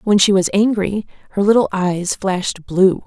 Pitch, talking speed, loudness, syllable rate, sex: 195 Hz, 175 wpm, -17 LUFS, 4.6 syllables/s, female